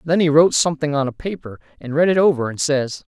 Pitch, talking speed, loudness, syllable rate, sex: 150 Hz, 250 wpm, -18 LUFS, 6.5 syllables/s, male